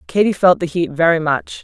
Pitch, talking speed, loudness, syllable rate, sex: 170 Hz, 220 wpm, -16 LUFS, 5.4 syllables/s, female